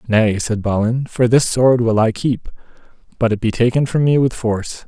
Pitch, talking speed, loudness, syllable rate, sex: 115 Hz, 210 wpm, -17 LUFS, 5.0 syllables/s, male